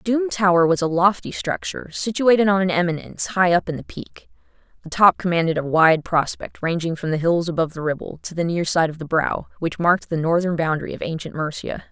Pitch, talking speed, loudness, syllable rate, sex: 175 Hz, 215 wpm, -20 LUFS, 5.7 syllables/s, female